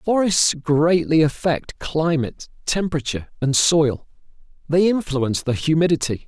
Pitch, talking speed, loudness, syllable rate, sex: 155 Hz, 105 wpm, -20 LUFS, 4.7 syllables/s, male